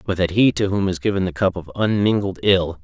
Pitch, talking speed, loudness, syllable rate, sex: 95 Hz, 255 wpm, -19 LUFS, 5.7 syllables/s, male